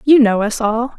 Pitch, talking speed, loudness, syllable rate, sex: 235 Hz, 245 wpm, -15 LUFS, 4.7 syllables/s, female